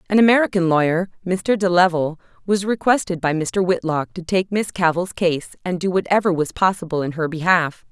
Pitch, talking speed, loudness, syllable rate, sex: 180 Hz, 180 wpm, -19 LUFS, 5.4 syllables/s, female